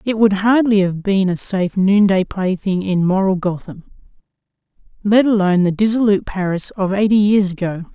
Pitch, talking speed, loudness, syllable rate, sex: 195 Hz, 160 wpm, -16 LUFS, 5.2 syllables/s, female